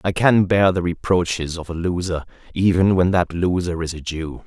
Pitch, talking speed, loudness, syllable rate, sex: 90 Hz, 200 wpm, -20 LUFS, 4.9 syllables/s, male